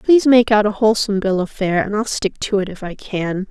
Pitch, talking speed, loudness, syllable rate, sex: 205 Hz, 275 wpm, -17 LUFS, 5.9 syllables/s, female